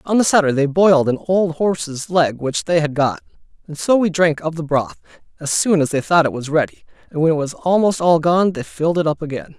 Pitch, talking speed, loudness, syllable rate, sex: 160 Hz, 250 wpm, -17 LUFS, 5.8 syllables/s, male